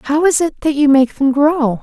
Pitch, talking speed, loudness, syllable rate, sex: 290 Hz, 265 wpm, -13 LUFS, 4.5 syllables/s, female